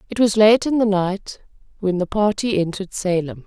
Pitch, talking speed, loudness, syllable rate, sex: 200 Hz, 190 wpm, -19 LUFS, 5.3 syllables/s, female